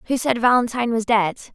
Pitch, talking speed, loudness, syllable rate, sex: 235 Hz, 195 wpm, -19 LUFS, 5.8 syllables/s, female